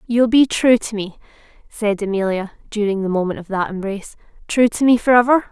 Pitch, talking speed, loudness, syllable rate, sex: 215 Hz, 185 wpm, -18 LUFS, 5.7 syllables/s, female